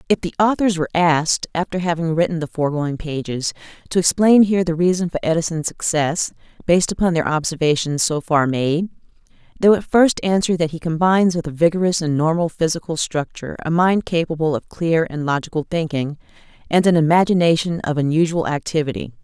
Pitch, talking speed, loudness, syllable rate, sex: 165 Hz, 170 wpm, -19 LUFS, 5.9 syllables/s, female